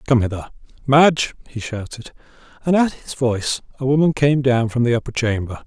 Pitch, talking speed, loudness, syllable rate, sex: 125 Hz, 180 wpm, -19 LUFS, 5.5 syllables/s, male